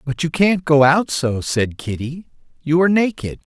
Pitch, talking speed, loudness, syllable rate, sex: 155 Hz, 185 wpm, -17 LUFS, 4.6 syllables/s, male